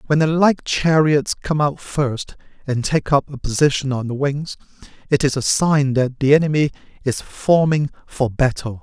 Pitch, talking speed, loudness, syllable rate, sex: 140 Hz, 175 wpm, -18 LUFS, 4.5 syllables/s, male